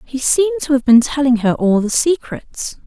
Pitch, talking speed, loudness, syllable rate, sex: 270 Hz, 210 wpm, -15 LUFS, 4.4 syllables/s, female